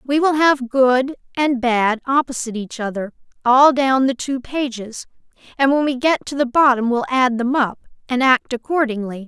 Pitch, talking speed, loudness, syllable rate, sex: 255 Hz, 180 wpm, -18 LUFS, 4.8 syllables/s, female